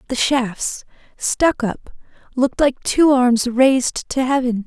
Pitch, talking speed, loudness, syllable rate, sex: 255 Hz, 140 wpm, -18 LUFS, 3.8 syllables/s, female